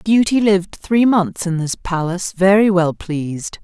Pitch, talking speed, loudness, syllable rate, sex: 190 Hz, 165 wpm, -17 LUFS, 4.5 syllables/s, female